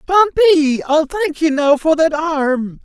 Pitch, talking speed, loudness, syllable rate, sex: 310 Hz, 170 wpm, -15 LUFS, 8.9 syllables/s, male